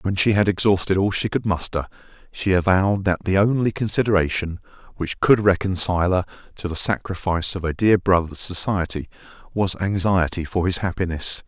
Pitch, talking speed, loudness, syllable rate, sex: 95 Hz, 160 wpm, -21 LUFS, 5.5 syllables/s, male